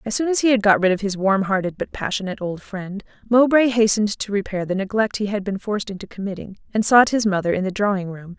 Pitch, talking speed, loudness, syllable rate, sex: 205 Hz, 250 wpm, -20 LUFS, 6.3 syllables/s, female